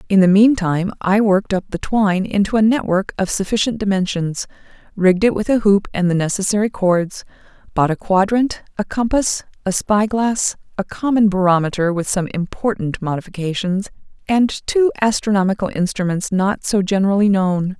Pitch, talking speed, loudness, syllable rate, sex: 200 Hz, 160 wpm, -18 LUFS, 5.2 syllables/s, female